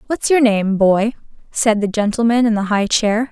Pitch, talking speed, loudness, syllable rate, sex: 220 Hz, 200 wpm, -16 LUFS, 4.7 syllables/s, female